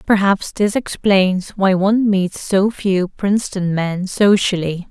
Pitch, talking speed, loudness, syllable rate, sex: 195 Hz, 135 wpm, -17 LUFS, 3.8 syllables/s, female